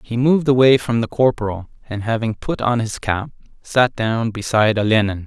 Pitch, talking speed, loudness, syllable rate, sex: 115 Hz, 180 wpm, -18 LUFS, 5.3 syllables/s, male